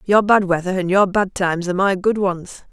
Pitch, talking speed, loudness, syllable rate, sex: 190 Hz, 245 wpm, -18 LUFS, 5.5 syllables/s, female